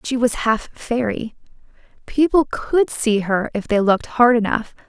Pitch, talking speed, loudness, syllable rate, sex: 235 Hz, 160 wpm, -19 LUFS, 4.4 syllables/s, female